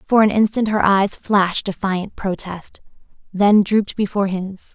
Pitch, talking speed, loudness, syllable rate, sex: 200 Hz, 150 wpm, -18 LUFS, 4.6 syllables/s, female